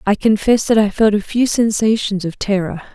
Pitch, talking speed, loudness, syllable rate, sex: 210 Hz, 205 wpm, -16 LUFS, 5.2 syllables/s, female